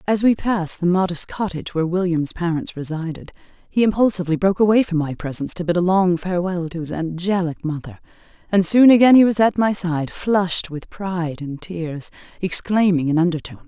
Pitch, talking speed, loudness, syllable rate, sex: 180 Hz, 185 wpm, -19 LUFS, 5.8 syllables/s, female